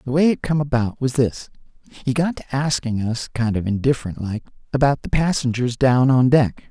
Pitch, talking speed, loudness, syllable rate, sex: 130 Hz, 195 wpm, -20 LUFS, 5.4 syllables/s, male